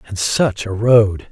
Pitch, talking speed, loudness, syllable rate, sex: 105 Hz, 180 wpm, -15 LUFS, 3.5 syllables/s, male